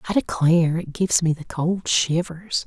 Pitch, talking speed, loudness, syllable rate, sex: 170 Hz, 180 wpm, -21 LUFS, 4.8 syllables/s, female